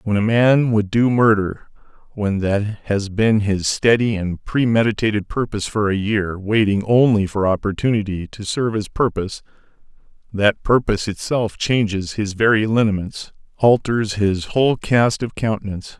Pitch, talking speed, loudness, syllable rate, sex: 105 Hz, 145 wpm, -19 LUFS, 4.8 syllables/s, male